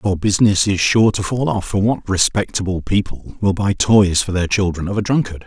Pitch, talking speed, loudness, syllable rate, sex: 100 Hz, 220 wpm, -17 LUFS, 5.3 syllables/s, male